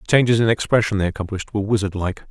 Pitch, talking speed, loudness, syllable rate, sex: 105 Hz, 235 wpm, -20 LUFS, 8.5 syllables/s, male